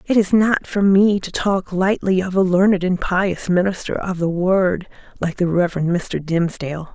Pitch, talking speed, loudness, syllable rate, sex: 185 Hz, 190 wpm, -18 LUFS, 4.8 syllables/s, female